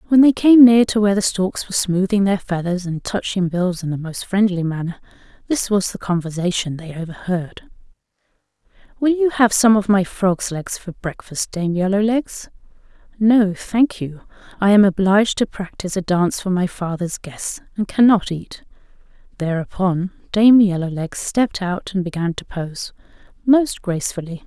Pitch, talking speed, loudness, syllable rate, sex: 195 Hz, 160 wpm, -18 LUFS, 4.9 syllables/s, female